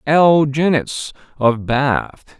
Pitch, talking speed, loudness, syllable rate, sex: 140 Hz, 100 wpm, -16 LUFS, 2.6 syllables/s, male